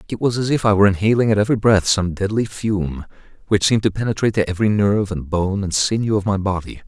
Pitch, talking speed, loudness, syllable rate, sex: 100 Hz, 235 wpm, -18 LUFS, 6.7 syllables/s, male